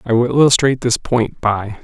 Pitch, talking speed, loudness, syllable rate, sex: 120 Hz, 195 wpm, -15 LUFS, 5.3 syllables/s, male